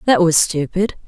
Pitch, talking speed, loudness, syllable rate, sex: 175 Hz, 165 wpm, -16 LUFS, 4.6 syllables/s, female